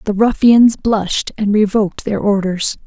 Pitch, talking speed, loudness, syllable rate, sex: 210 Hz, 145 wpm, -14 LUFS, 4.6 syllables/s, female